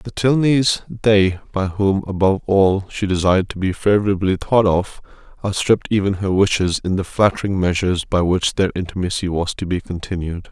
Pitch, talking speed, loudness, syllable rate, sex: 95 Hz, 170 wpm, -18 LUFS, 5.3 syllables/s, male